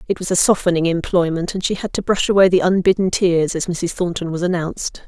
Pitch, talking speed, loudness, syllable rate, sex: 180 Hz, 225 wpm, -18 LUFS, 6.0 syllables/s, female